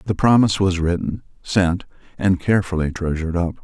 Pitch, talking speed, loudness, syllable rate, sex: 90 Hz, 150 wpm, -20 LUFS, 5.8 syllables/s, male